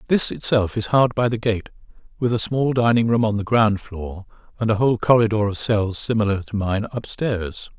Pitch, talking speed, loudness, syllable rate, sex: 110 Hz, 200 wpm, -21 LUFS, 5.1 syllables/s, male